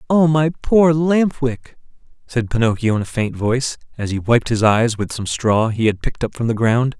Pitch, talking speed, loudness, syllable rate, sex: 125 Hz, 225 wpm, -18 LUFS, 5.0 syllables/s, male